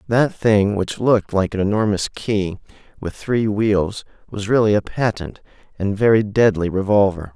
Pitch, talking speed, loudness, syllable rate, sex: 105 Hz, 155 wpm, -19 LUFS, 4.6 syllables/s, male